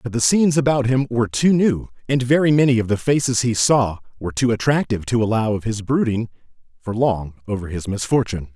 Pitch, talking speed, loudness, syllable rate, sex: 120 Hz, 205 wpm, -19 LUFS, 6.0 syllables/s, male